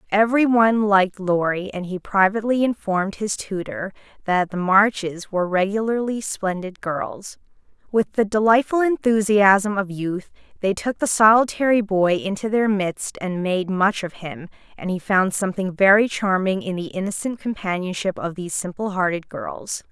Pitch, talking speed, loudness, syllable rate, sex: 200 Hz, 155 wpm, -21 LUFS, 4.9 syllables/s, female